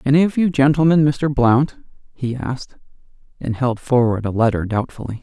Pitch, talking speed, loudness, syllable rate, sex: 130 Hz, 160 wpm, -18 LUFS, 5.2 syllables/s, male